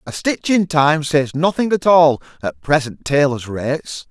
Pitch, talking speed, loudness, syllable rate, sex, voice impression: 150 Hz, 175 wpm, -17 LUFS, 4.5 syllables/s, male, very masculine, very middle-aged, thick, tensed, very powerful, bright, hard, very clear, very fluent, slightly raspy, cool, very intellectual, very refreshing, sincere, slightly calm, mature, very friendly, very reassuring, very unique, slightly elegant, wild, slightly sweet, very lively, slightly kind, intense